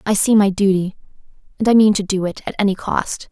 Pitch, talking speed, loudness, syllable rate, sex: 200 Hz, 235 wpm, -17 LUFS, 6.0 syllables/s, female